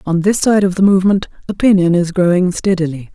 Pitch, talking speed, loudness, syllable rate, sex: 185 Hz, 190 wpm, -14 LUFS, 6.0 syllables/s, female